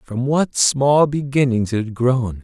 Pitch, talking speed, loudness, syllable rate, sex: 130 Hz, 175 wpm, -18 LUFS, 3.9 syllables/s, male